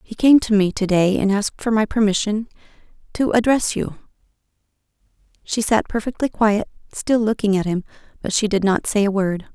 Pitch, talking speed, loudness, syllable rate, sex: 210 Hz, 175 wpm, -19 LUFS, 5.3 syllables/s, female